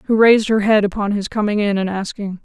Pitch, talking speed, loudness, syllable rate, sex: 205 Hz, 245 wpm, -17 LUFS, 5.9 syllables/s, female